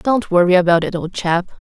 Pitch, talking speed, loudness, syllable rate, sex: 185 Hz, 215 wpm, -16 LUFS, 5.3 syllables/s, female